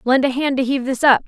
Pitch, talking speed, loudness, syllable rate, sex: 265 Hz, 330 wpm, -17 LUFS, 7.0 syllables/s, female